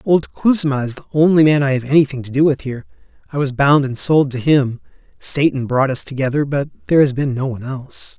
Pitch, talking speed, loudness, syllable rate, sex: 140 Hz, 225 wpm, -17 LUFS, 6.0 syllables/s, male